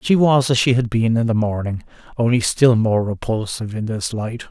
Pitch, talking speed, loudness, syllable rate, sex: 115 Hz, 215 wpm, -18 LUFS, 5.2 syllables/s, male